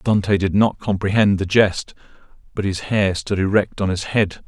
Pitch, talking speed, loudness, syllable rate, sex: 100 Hz, 190 wpm, -19 LUFS, 4.8 syllables/s, male